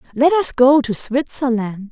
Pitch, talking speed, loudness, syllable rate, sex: 255 Hz, 155 wpm, -16 LUFS, 4.4 syllables/s, female